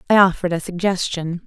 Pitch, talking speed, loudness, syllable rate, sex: 180 Hz, 165 wpm, -19 LUFS, 6.4 syllables/s, female